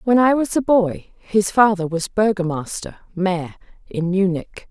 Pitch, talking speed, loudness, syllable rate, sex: 195 Hz, 130 wpm, -19 LUFS, 4.1 syllables/s, female